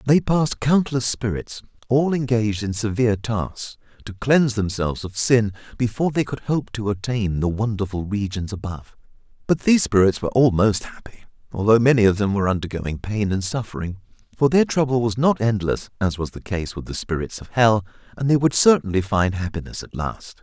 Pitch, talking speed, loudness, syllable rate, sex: 110 Hz, 180 wpm, -21 LUFS, 5.6 syllables/s, male